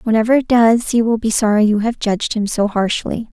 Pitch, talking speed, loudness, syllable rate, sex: 225 Hz, 230 wpm, -16 LUFS, 5.6 syllables/s, female